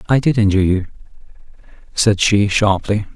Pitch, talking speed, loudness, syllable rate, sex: 105 Hz, 135 wpm, -16 LUFS, 5.4 syllables/s, male